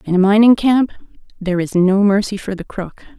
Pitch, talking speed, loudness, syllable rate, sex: 200 Hz, 205 wpm, -15 LUFS, 5.0 syllables/s, female